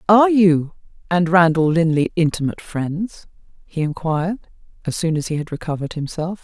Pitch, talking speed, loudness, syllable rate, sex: 170 Hz, 150 wpm, -19 LUFS, 5.5 syllables/s, female